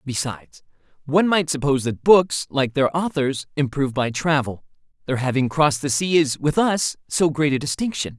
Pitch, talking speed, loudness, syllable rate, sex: 140 Hz, 175 wpm, -20 LUFS, 5.3 syllables/s, male